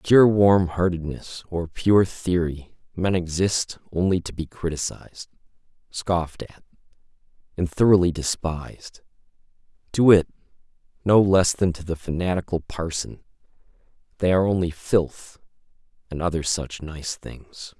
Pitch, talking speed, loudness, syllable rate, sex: 90 Hz, 120 wpm, -22 LUFS, 4.4 syllables/s, male